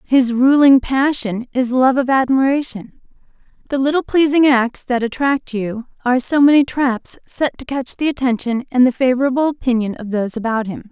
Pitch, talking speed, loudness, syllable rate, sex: 255 Hz, 170 wpm, -16 LUFS, 5.2 syllables/s, female